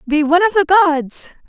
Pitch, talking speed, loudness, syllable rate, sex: 335 Hz, 205 wpm, -13 LUFS, 5.6 syllables/s, female